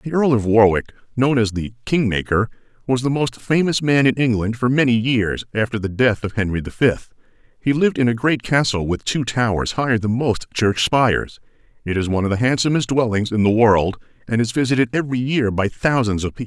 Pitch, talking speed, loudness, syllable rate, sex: 120 Hz, 210 wpm, -19 LUFS, 5.7 syllables/s, male